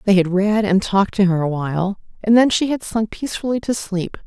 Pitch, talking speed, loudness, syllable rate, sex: 200 Hz, 240 wpm, -18 LUFS, 5.7 syllables/s, female